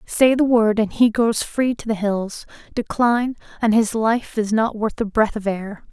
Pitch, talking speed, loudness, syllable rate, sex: 220 Hz, 215 wpm, -20 LUFS, 4.4 syllables/s, female